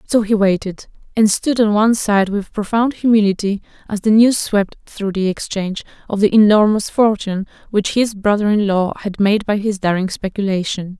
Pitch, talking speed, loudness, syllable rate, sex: 205 Hz, 180 wpm, -16 LUFS, 5.2 syllables/s, female